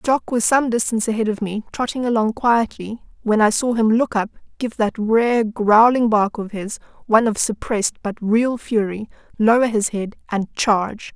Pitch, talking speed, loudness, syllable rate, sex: 220 Hz, 170 wpm, -19 LUFS, 4.8 syllables/s, female